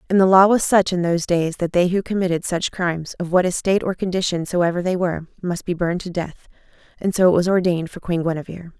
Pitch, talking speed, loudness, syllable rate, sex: 180 Hz, 240 wpm, -20 LUFS, 6.3 syllables/s, female